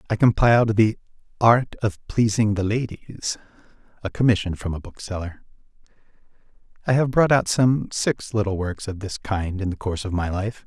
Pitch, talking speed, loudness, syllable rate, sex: 105 Hz, 170 wpm, -22 LUFS, 5.1 syllables/s, male